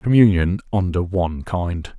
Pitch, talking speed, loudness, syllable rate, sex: 90 Hz, 120 wpm, -20 LUFS, 4.4 syllables/s, male